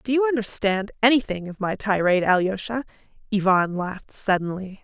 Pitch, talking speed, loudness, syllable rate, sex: 205 Hz, 135 wpm, -23 LUFS, 5.6 syllables/s, female